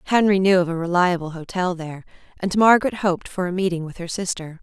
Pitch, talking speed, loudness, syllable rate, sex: 180 Hz, 210 wpm, -21 LUFS, 6.3 syllables/s, female